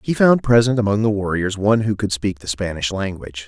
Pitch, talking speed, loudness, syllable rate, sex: 105 Hz, 225 wpm, -18 LUFS, 5.9 syllables/s, male